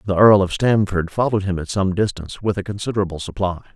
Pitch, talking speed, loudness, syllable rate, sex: 95 Hz, 210 wpm, -19 LUFS, 6.6 syllables/s, male